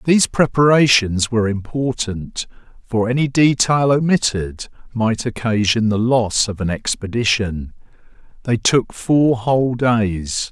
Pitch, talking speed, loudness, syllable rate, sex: 115 Hz, 115 wpm, -17 LUFS, 4.1 syllables/s, male